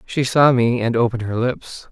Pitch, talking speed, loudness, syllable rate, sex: 120 Hz, 220 wpm, -18 LUFS, 5.0 syllables/s, male